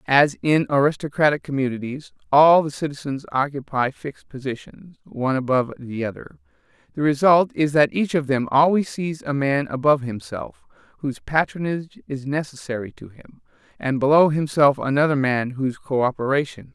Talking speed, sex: 155 wpm, male